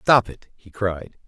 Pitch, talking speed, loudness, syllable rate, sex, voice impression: 105 Hz, 190 wpm, -22 LUFS, 3.6 syllables/s, male, masculine, adult-like, fluent, cool, slightly elegant